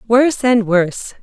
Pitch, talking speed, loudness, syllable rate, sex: 225 Hz, 145 wpm, -15 LUFS, 5.0 syllables/s, female